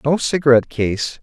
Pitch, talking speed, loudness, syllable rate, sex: 135 Hz, 145 wpm, -17 LUFS, 5.3 syllables/s, male